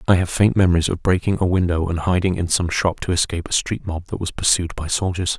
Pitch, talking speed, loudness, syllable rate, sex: 90 Hz, 255 wpm, -20 LUFS, 6.2 syllables/s, male